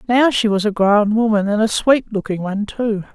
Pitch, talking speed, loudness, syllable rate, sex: 215 Hz, 230 wpm, -17 LUFS, 5.3 syllables/s, female